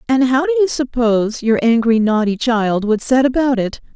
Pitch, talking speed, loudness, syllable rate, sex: 240 Hz, 195 wpm, -16 LUFS, 5.0 syllables/s, female